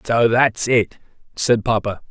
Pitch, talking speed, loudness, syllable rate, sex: 115 Hz, 145 wpm, -18 LUFS, 3.9 syllables/s, male